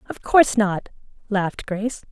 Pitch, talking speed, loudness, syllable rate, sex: 215 Hz, 140 wpm, -21 LUFS, 5.5 syllables/s, female